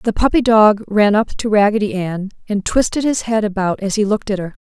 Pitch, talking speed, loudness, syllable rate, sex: 210 Hz, 235 wpm, -16 LUFS, 5.5 syllables/s, female